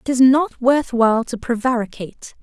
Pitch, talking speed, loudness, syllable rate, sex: 245 Hz, 175 wpm, -17 LUFS, 5.3 syllables/s, female